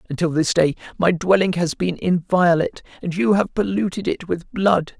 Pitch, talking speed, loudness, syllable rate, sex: 175 Hz, 180 wpm, -20 LUFS, 5.0 syllables/s, male